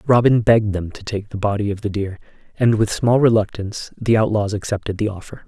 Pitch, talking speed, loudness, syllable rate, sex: 105 Hz, 210 wpm, -19 LUFS, 5.9 syllables/s, male